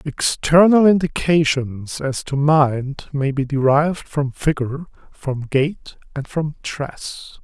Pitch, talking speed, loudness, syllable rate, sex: 145 Hz, 120 wpm, -19 LUFS, 3.5 syllables/s, male